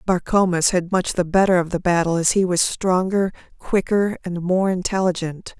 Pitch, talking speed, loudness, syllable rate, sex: 180 Hz, 180 wpm, -20 LUFS, 4.9 syllables/s, female